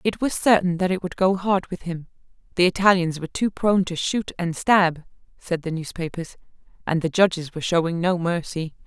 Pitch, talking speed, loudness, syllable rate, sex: 175 Hz, 195 wpm, -22 LUFS, 5.5 syllables/s, female